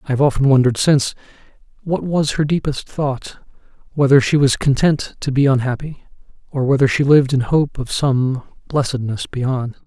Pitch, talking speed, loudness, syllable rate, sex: 135 Hz, 160 wpm, -17 LUFS, 5.2 syllables/s, male